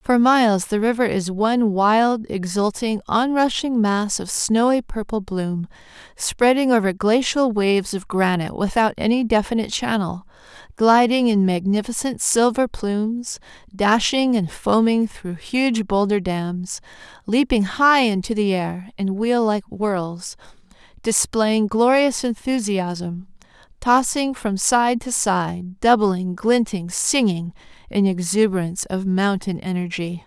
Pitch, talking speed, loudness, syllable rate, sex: 210 Hz, 125 wpm, -20 LUFS, 4.0 syllables/s, female